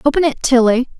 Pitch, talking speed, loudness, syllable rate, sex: 265 Hz, 180 wpm, -14 LUFS, 6.1 syllables/s, female